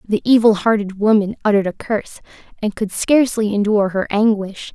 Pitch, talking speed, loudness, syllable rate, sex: 210 Hz, 165 wpm, -17 LUFS, 5.8 syllables/s, female